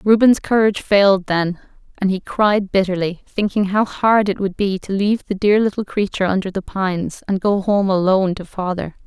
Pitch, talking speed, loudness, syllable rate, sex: 195 Hz, 190 wpm, -18 LUFS, 5.4 syllables/s, female